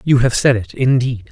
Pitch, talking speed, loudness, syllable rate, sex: 125 Hz, 230 wpm, -15 LUFS, 5.1 syllables/s, male